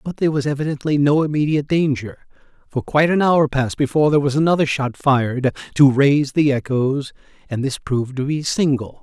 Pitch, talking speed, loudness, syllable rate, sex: 140 Hz, 185 wpm, -18 LUFS, 6.1 syllables/s, male